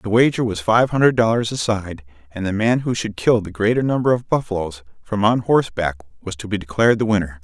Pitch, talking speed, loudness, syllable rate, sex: 105 Hz, 225 wpm, -19 LUFS, 5.9 syllables/s, male